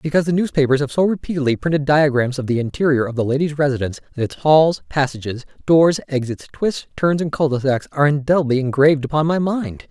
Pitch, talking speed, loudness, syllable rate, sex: 145 Hz, 200 wpm, -18 LUFS, 6.4 syllables/s, male